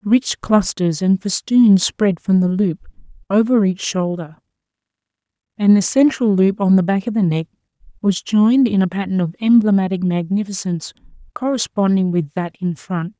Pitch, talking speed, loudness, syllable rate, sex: 195 Hz, 155 wpm, -17 LUFS, 4.9 syllables/s, female